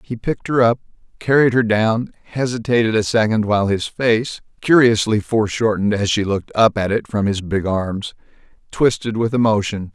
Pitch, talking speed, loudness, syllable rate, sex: 110 Hz, 155 wpm, -18 LUFS, 5.3 syllables/s, male